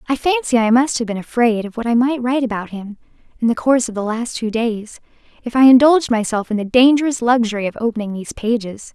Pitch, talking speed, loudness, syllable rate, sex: 235 Hz, 230 wpm, -17 LUFS, 6.3 syllables/s, female